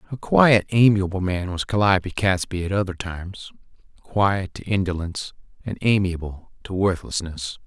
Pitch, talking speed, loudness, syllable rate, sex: 95 Hz, 125 wpm, -22 LUFS, 5.0 syllables/s, male